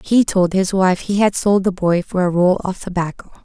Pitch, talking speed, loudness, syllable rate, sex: 185 Hz, 245 wpm, -17 LUFS, 4.9 syllables/s, female